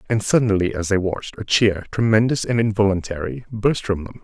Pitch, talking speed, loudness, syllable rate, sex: 105 Hz, 185 wpm, -20 LUFS, 5.6 syllables/s, male